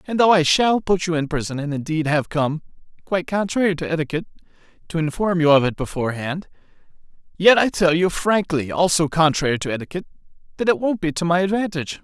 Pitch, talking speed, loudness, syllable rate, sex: 165 Hz, 180 wpm, -20 LUFS, 6.4 syllables/s, male